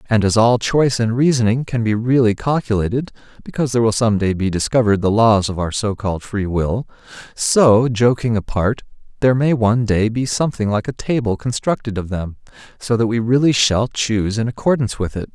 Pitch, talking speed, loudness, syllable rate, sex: 115 Hz, 185 wpm, -17 LUFS, 5.8 syllables/s, male